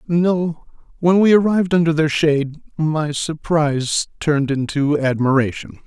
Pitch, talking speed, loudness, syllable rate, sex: 155 Hz, 125 wpm, -18 LUFS, 4.5 syllables/s, male